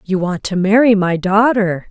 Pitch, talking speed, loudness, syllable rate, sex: 200 Hz, 190 wpm, -14 LUFS, 4.4 syllables/s, female